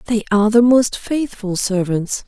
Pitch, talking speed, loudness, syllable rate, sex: 215 Hz, 160 wpm, -17 LUFS, 4.5 syllables/s, female